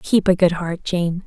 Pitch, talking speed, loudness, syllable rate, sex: 180 Hz, 235 wpm, -19 LUFS, 4.3 syllables/s, female